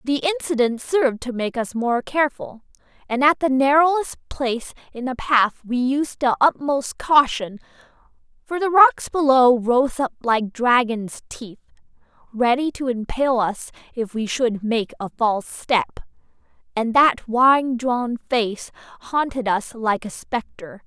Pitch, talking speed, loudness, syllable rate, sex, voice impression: 250 Hz, 145 wpm, -20 LUFS, 4.2 syllables/s, female, feminine, slightly adult-like, powerful, clear, slightly cute, slightly unique, slightly lively